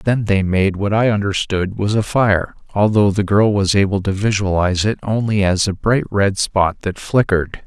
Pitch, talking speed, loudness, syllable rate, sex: 100 Hz, 195 wpm, -17 LUFS, 4.7 syllables/s, male